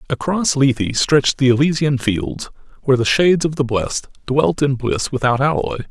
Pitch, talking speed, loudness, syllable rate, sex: 135 Hz, 175 wpm, -17 LUFS, 5.1 syllables/s, male